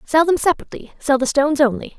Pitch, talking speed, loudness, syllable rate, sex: 285 Hz, 210 wpm, -18 LUFS, 7.1 syllables/s, female